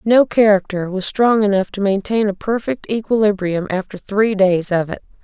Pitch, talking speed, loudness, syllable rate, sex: 205 Hz, 170 wpm, -17 LUFS, 4.9 syllables/s, female